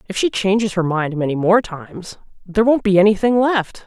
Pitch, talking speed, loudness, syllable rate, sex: 195 Hz, 200 wpm, -17 LUFS, 5.5 syllables/s, female